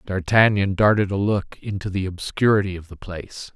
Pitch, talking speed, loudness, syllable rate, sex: 95 Hz, 170 wpm, -21 LUFS, 5.3 syllables/s, male